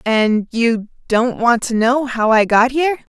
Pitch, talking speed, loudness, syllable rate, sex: 240 Hz, 190 wpm, -16 LUFS, 4.2 syllables/s, female